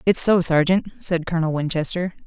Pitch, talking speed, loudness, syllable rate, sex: 175 Hz, 160 wpm, -20 LUFS, 5.7 syllables/s, female